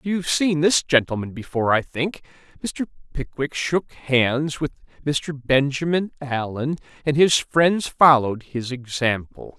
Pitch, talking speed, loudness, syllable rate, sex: 140 Hz, 130 wpm, -21 LUFS, 4.2 syllables/s, male